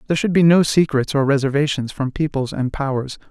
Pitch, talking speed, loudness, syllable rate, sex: 145 Hz, 200 wpm, -18 LUFS, 5.9 syllables/s, male